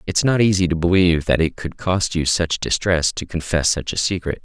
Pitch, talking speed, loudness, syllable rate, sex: 85 Hz, 230 wpm, -19 LUFS, 5.4 syllables/s, male